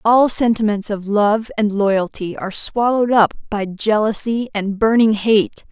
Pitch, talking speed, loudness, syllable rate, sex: 215 Hz, 145 wpm, -17 LUFS, 4.3 syllables/s, female